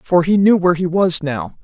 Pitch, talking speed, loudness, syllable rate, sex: 180 Hz, 255 wpm, -15 LUFS, 5.3 syllables/s, female